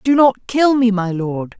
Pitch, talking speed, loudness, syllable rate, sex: 225 Hz, 225 wpm, -16 LUFS, 4.1 syllables/s, female